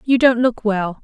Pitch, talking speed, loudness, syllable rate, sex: 225 Hz, 230 wpm, -17 LUFS, 4.4 syllables/s, female